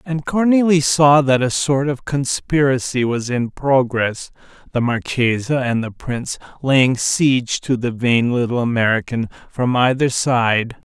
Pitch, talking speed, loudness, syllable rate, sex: 130 Hz, 140 wpm, -17 LUFS, 4.2 syllables/s, male